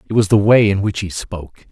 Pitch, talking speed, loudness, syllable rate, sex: 100 Hz, 280 wpm, -15 LUFS, 5.9 syllables/s, male